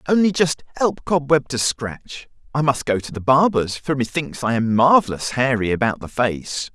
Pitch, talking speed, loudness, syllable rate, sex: 135 Hz, 185 wpm, -20 LUFS, 4.7 syllables/s, male